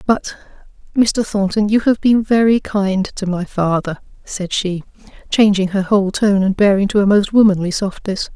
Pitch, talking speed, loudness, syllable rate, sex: 200 Hz, 170 wpm, -16 LUFS, 4.8 syllables/s, female